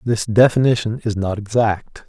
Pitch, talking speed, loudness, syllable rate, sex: 110 Hz, 145 wpm, -18 LUFS, 4.6 syllables/s, male